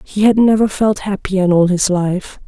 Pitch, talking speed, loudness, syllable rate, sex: 195 Hz, 220 wpm, -14 LUFS, 4.7 syllables/s, female